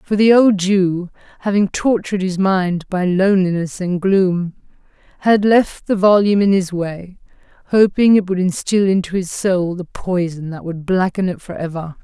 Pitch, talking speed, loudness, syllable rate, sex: 185 Hz, 170 wpm, -16 LUFS, 4.7 syllables/s, female